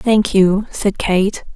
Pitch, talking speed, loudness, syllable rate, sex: 200 Hz, 155 wpm, -16 LUFS, 2.9 syllables/s, female